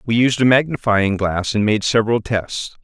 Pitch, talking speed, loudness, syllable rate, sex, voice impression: 110 Hz, 190 wpm, -17 LUFS, 4.9 syllables/s, male, masculine, adult-like, thick, cool, sincere, calm, slightly wild